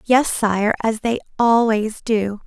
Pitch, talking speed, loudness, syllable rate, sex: 220 Hz, 145 wpm, -19 LUFS, 3.5 syllables/s, female